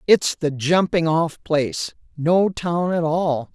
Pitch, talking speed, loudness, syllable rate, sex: 165 Hz, 150 wpm, -20 LUFS, 3.5 syllables/s, female